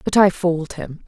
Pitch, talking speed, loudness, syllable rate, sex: 175 Hz, 225 wpm, -18 LUFS, 5.2 syllables/s, female